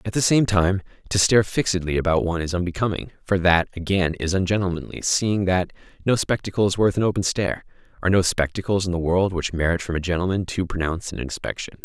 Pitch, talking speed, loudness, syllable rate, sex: 90 Hz, 200 wpm, -22 LUFS, 6.4 syllables/s, male